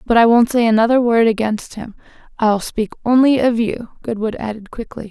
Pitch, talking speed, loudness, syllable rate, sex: 230 Hz, 190 wpm, -16 LUFS, 5.3 syllables/s, female